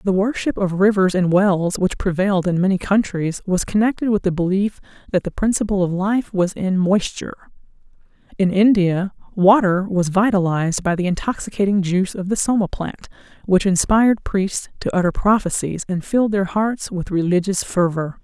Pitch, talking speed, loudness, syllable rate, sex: 190 Hz, 165 wpm, -19 LUFS, 5.3 syllables/s, female